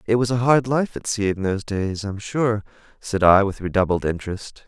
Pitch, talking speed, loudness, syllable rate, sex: 105 Hz, 230 wpm, -21 LUFS, 5.5 syllables/s, male